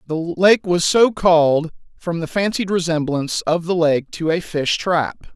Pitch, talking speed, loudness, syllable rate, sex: 170 Hz, 180 wpm, -18 LUFS, 4.4 syllables/s, male